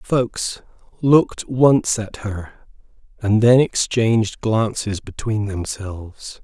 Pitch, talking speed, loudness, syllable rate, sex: 110 Hz, 105 wpm, -19 LUFS, 3.3 syllables/s, male